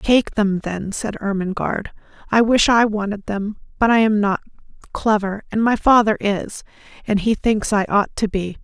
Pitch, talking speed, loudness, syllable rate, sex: 210 Hz, 180 wpm, -19 LUFS, 4.6 syllables/s, female